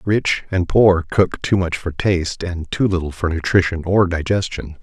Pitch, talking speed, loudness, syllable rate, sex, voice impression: 90 Hz, 185 wpm, -18 LUFS, 4.7 syllables/s, male, masculine, adult-like, slightly thick, cool, intellectual, calm